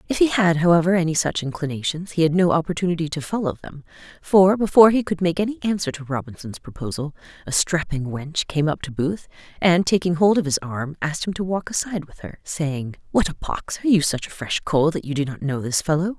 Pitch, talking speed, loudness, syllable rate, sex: 165 Hz, 225 wpm, -21 LUFS, 5.9 syllables/s, female